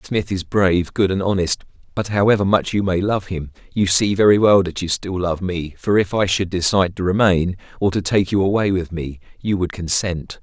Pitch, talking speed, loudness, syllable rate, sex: 95 Hz, 225 wpm, -19 LUFS, 5.2 syllables/s, male